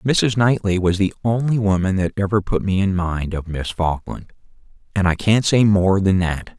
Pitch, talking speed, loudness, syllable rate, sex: 100 Hz, 200 wpm, -19 LUFS, 4.6 syllables/s, male